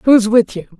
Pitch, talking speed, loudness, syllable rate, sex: 220 Hz, 230 wpm, -12 LUFS, 5.2 syllables/s, female